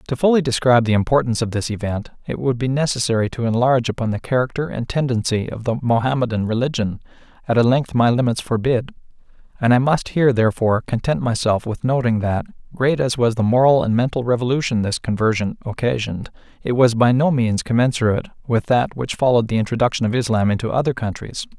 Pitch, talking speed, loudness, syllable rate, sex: 120 Hz, 185 wpm, -19 LUFS, 6.3 syllables/s, male